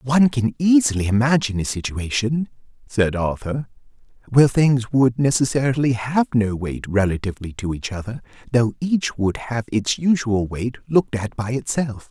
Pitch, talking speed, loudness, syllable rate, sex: 120 Hz, 150 wpm, -20 LUFS, 5.0 syllables/s, male